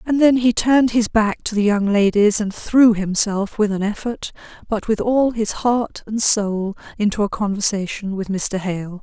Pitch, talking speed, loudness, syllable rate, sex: 215 Hz, 195 wpm, -18 LUFS, 4.5 syllables/s, female